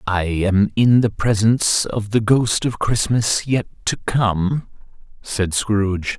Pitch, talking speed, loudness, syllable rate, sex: 110 Hz, 145 wpm, -18 LUFS, 3.7 syllables/s, male